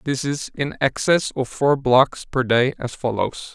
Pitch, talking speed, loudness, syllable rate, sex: 135 Hz, 185 wpm, -20 LUFS, 4.0 syllables/s, male